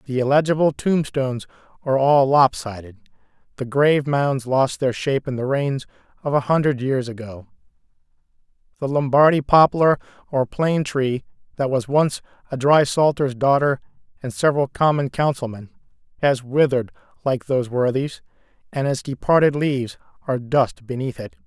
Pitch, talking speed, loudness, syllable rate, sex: 135 Hz, 140 wpm, -20 LUFS, 5.2 syllables/s, male